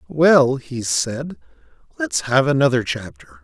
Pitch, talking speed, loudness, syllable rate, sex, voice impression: 145 Hz, 120 wpm, -18 LUFS, 4.0 syllables/s, male, masculine, adult-like, slightly bright, slightly refreshing, sincere